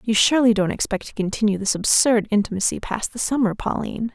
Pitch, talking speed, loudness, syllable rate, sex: 215 Hz, 190 wpm, -20 LUFS, 6.3 syllables/s, female